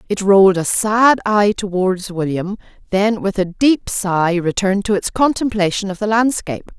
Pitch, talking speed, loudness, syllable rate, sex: 200 Hz, 170 wpm, -16 LUFS, 4.7 syllables/s, female